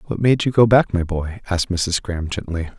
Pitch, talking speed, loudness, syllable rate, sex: 95 Hz, 235 wpm, -19 LUFS, 5.4 syllables/s, male